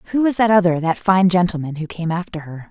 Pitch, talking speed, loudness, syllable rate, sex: 180 Hz, 245 wpm, -18 LUFS, 6.1 syllables/s, female